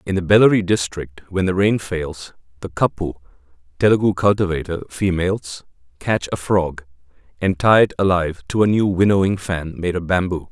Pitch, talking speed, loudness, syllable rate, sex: 90 Hz, 160 wpm, -19 LUFS, 5.3 syllables/s, male